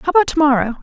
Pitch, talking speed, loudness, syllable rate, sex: 295 Hz, 290 wpm, -15 LUFS, 8.6 syllables/s, female